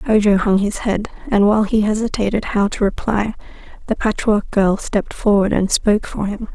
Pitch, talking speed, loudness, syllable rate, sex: 205 Hz, 185 wpm, -18 LUFS, 5.4 syllables/s, female